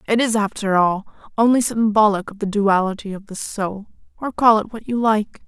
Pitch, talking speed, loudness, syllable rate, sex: 210 Hz, 185 wpm, -19 LUFS, 5.4 syllables/s, female